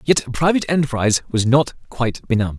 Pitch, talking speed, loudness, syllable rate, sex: 130 Hz, 165 wpm, -19 LUFS, 6.4 syllables/s, male